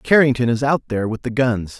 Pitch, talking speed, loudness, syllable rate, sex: 125 Hz, 235 wpm, -18 LUFS, 5.9 syllables/s, male